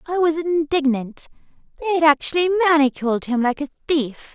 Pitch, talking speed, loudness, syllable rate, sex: 300 Hz, 150 wpm, -19 LUFS, 5.2 syllables/s, female